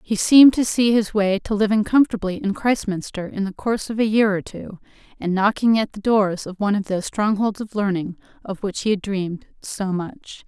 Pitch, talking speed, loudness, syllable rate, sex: 205 Hz, 220 wpm, -20 LUFS, 5.4 syllables/s, female